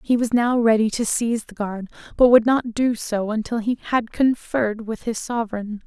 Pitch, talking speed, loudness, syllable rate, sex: 225 Hz, 205 wpm, -21 LUFS, 5.1 syllables/s, female